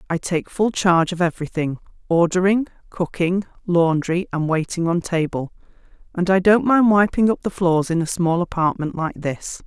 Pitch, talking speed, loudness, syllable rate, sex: 175 Hz, 160 wpm, -20 LUFS, 5.0 syllables/s, female